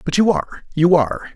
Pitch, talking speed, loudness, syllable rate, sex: 165 Hz, 220 wpm, -17 LUFS, 6.0 syllables/s, male